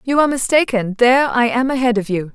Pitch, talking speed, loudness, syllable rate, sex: 240 Hz, 230 wpm, -16 LUFS, 6.3 syllables/s, female